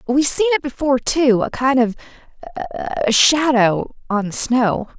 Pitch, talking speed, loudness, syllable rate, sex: 255 Hz, 145 wpm, -17 LUFS, 4.5 syllables/s, female